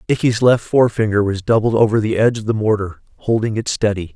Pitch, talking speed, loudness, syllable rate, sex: 110 Hz, 200 wpm, -17 LUFS, 6.3 syllables/s, male